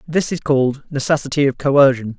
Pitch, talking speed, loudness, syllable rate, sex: 140 Hz, 165 wpm, -17 LUFS, 5.5 syllables/s, male